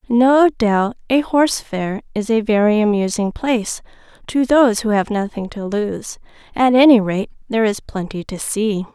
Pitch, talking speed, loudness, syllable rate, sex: 220 Hz, 170 wpm, -17 LUFS, 4.7 syllables/s, female